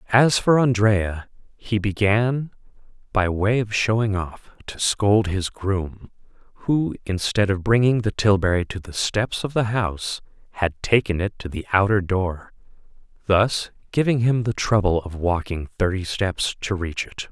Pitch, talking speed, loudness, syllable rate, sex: 100 Hz, 155 wpm, -22 LUFS, 4.2 syllables/s, male